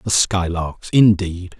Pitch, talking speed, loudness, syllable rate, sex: 90 Hz, 115 wpm, -17 LUFS, 3.3 syllables/s, male